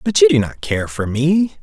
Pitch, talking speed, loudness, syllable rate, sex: 135 Hz, 260 wpm, -17 LUFS, 4.8 syllables/s, male